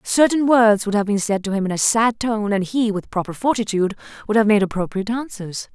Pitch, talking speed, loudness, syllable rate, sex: 210 Hz, 230 wpm, -19 LUFS, 5.9 syllables/s, female